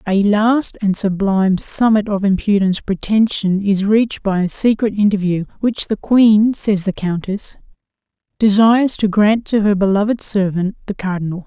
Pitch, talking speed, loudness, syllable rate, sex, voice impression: 205 Hz, 150 wpm, -16 LUFS, 4.7 syllables/s, female, feminine, very adult-like, slightly muffled, intellectual, slightly calm, slightly elegant